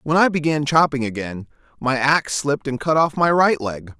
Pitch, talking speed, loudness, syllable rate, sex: 140 Hz, 210 wpm, -19 LUFS, 5.2 syllables/s, male